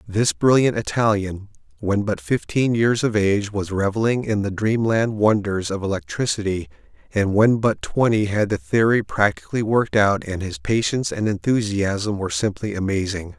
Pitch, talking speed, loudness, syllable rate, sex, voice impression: 105 Hz, 155 wpm, -21 LUFS, 5.0 syllables/s, male, very masculine, very adult-like, thick, slightly muffled, cool, slightly intellectual, calm, slightly mature, elegant